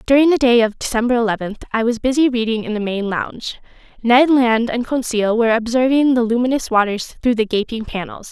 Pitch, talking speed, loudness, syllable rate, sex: 235 Hz, 195 wpm, -17 LUFS, 5.8 syllables/s, female